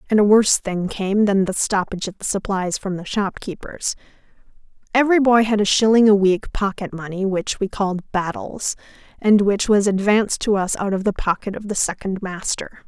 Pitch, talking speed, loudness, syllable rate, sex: 200 Hz, 190 wpm, -19 LUFS, 5.3 syllables/s, female